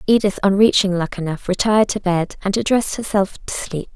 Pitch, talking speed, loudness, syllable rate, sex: 195 Hz, 180 wpm, -18 LUFS, 5.7 syllables/s, female